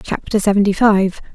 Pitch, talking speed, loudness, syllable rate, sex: 200 Hz, 135 wpm, -15 LUFS, 5.3 syllables/s, female